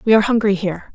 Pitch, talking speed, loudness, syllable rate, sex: 205 Hz, 255 wpm, -17 LUFS, 8.2 syllables/s, female